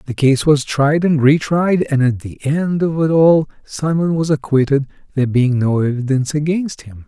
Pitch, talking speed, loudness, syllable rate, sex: 145 Hz, 195 wpm, -16 LUFS, 4.8 syllables/s, male